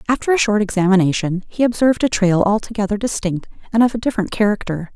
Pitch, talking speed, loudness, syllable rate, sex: 210 Hz, 180 wpm, -17 LUFS, 6.8 syllables/s, female